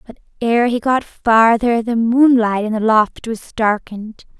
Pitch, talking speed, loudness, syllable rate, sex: 230 Hz, 165 wpm, -15 LUFS, 4.2 syllables/s, female